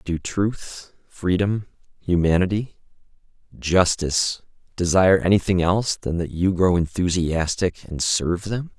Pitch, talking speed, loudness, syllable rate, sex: 90 Hz, 110 wpm, -21 LUFS, 4.3 syllables/s, male